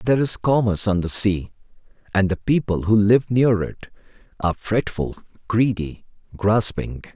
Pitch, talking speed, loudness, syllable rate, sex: 105 Hz, 140 wpm, -20 LUFS, 4.7 syllables/s, male